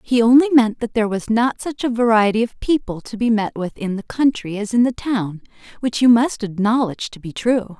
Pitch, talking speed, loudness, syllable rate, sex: 225 Hz, 230 wpm, -18 LUFS, 5.3 syllables/s, female